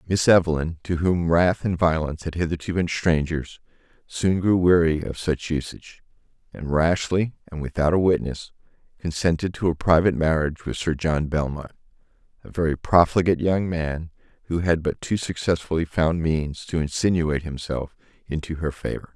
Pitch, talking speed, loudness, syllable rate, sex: 85 Hz, 155 wpm, -23 LUFS, 5.2 syllables/s, male